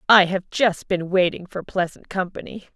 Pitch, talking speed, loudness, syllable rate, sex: 185 Hz, 175 wpm, -22 LUFS, 4.7 syllables/s, female